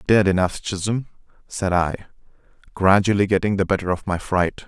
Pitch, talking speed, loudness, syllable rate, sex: 95 Hz, 155 wpm, -21 LUFS, 5.2 syllables/s, male